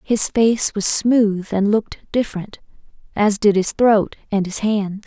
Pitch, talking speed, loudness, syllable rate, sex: 210 Hz, 165 wpm, -18 LUFS, 4.2 syllables/s, female